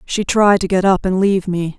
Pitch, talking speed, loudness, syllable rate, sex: 190 Hz, 270 wpm, -15 LUFS, 5.3 syllables/s, female